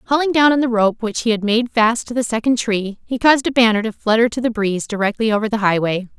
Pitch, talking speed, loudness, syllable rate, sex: 225 Hz, 260 wpm, -17 LUFS, 6.2 syllables/s, female